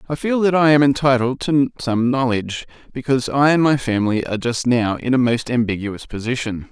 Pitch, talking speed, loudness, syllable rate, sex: 125 Hz, 195 wpm, -18 LUFS, 5.7 syllables/s, male